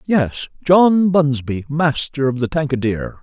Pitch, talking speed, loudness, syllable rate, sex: 145 Hz, 130 wpm, -17 LUFS, 4.1 syllables/s, male